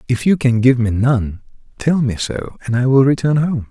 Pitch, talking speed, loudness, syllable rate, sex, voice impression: 125 Hz, 225 wpm, -16 LUFS, 4.9 syllables/s, male, very masculine, very adult-like, very middle-aged, slightly old, very thick, slightly relaxed, very powerful, slightly dark, soft, slightly muffled, fluent, very cool, intellectual, very sincere, very calm, very mature, very friendly, very reassuring, unique, slightly elegant, wild, slightly sweet, slightly lively, very kind, modest